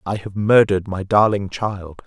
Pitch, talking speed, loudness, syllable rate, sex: 100 Hz, 175 wpm, -18 LUFS, 4.7 syllables/s, male